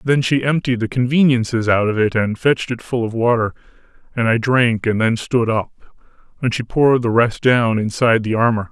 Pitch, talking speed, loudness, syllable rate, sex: 120 Hz, 205 wpm, -17 LUFS, 5.5 syllables/s, male